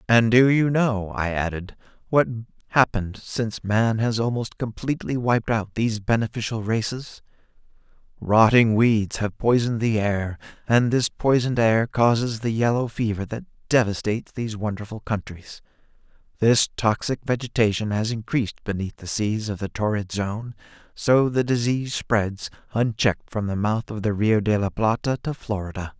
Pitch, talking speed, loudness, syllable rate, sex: 110 Hz, 150 wpm, -23 LUFS, 5.0 syllables/s, male